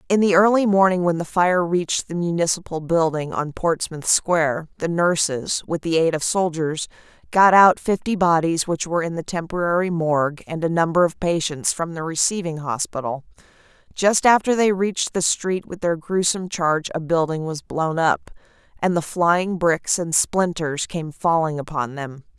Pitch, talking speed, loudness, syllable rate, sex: 170 Hz, 175 wpm, -20 LUFS, 4.8 syllables/s, female